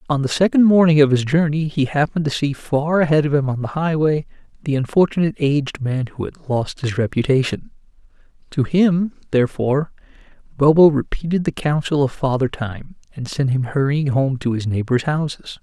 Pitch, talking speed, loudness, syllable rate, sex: 145 Hz, 175 wpm, -18 LUFS, 5.4 syllables/s, male